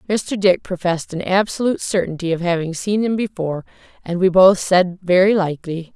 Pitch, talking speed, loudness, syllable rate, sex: 185 Hz, 170 wpm, -18 LUFS, 5.6 syllables/s, female